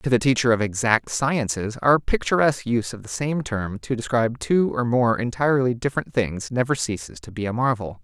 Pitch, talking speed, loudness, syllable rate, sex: 120 Hz, 200 wpm, -22 LUFS, 5.5 syllables/s, male